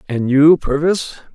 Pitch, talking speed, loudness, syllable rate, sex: 150 Hz, 135 wpm, -14 LUFS, 4.0 syllables/s, male